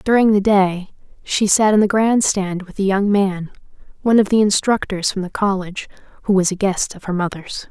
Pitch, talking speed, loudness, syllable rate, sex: 200 Hz, 210 wpm, -17 LUFS, 5.3 syllables/s, female